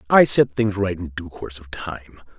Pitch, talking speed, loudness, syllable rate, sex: 95 Hz, 225 wpm, -21 LUFS, 4.9 syllables/s, male